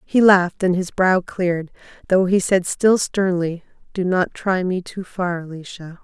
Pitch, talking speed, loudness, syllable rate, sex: 180 Hz, 180 wpm, -19 LUFS, 4.4 syllables/s, female